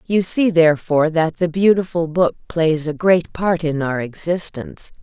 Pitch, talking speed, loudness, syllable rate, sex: 165 Hz, 165 wpm, -18 LUFS, 4.7 syllables/s, female